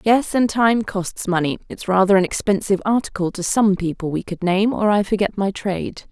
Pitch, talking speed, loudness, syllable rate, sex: 200 Hz, 205 wpm, -19 LUFS, 5.3 syllables/s, female